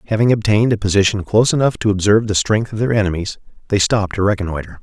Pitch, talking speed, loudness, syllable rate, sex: 105 Hz, 210 wpm, -16 LUFS, 7.5 syllables/s, male